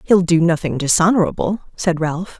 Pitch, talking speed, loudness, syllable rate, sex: 170 Hz, 150 wpm, -17 LUFS, 5.1 syllables/s, female